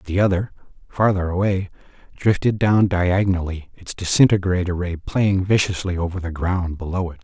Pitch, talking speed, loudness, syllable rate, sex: 90 Hz, 140 wpm, -20 LUFS, 5.0 syllables/s, male